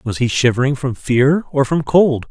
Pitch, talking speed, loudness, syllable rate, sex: 135 Hz, 210 wpm, -16 LUFS, 4.6 syllables/s, male